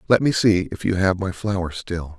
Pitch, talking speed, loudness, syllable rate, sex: 95 Hz, 245 wpm, -21 LUFS, 5.1 syllables/s, male